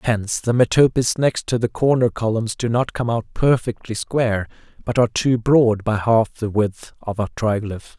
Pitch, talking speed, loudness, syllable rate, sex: 115 Hz, 190 wpm, -19 LUFS, 4.8 syllables/s, male